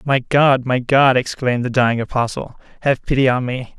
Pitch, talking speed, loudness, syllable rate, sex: 130 Hz, 190 wpm, -17 LUFS, 5.2 syllables/s, male